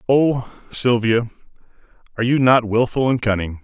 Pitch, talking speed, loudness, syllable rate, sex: 120 Hz, 130 wpm, -18 LUFS, 4.8 syllables/s, male